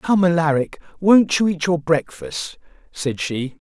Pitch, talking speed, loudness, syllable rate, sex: 160 Hz, 145 wpm, -19 LUFS, 4.0 syllables/s, male